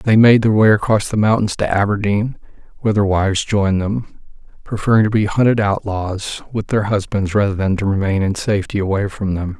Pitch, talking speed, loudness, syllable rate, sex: 105 Hz, 195 wpm, -17 LUFS, 5.6 syllables/s, male